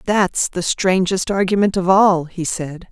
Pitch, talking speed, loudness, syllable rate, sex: 185 Hz, 165 wpm, -17 LUFS, 4.0 syllables/s, female